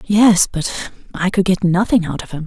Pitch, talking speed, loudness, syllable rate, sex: 190 Hz, 220 wpm, -16 LUFS, 4.8 syllables/s, female